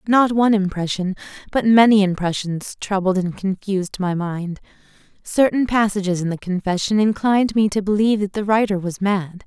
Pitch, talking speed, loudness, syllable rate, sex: 200 Hz, 160 wpm, -19 LUFS, 5.3 syllables/s, female